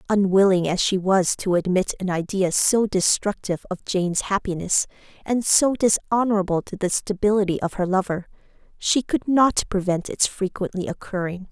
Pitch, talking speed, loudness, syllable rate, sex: 195 Hz, 150 wpm, -22 LUFS, 5.1 syllables/s, female